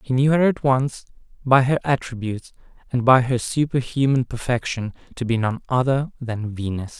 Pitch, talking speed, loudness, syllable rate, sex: 125 Hz, 165 wpm, -21 LUFS, 5.1 syllables/s, male